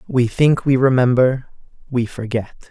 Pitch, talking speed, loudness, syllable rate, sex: 125 Hz, 135 wpm, -17 LUFS, 4.5 syllables/s, male